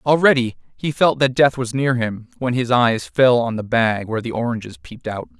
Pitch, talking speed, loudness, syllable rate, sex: 125 Hz, 225 wpm, -19 LUFS, 5.3 syllables/s, male